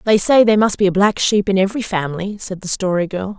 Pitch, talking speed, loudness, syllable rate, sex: 195 Hz, 265 wpm, -16 LUFS, 6.4 syllables/s, female